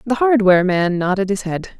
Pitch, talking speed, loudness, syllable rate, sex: 200 Hz, 200 wpm, -16 LUFS, 5.6 syllables/s, female